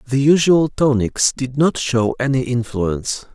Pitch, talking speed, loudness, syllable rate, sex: 130 Hz, 145 wpm, -17 LUFS, 4.1 syllables/s, male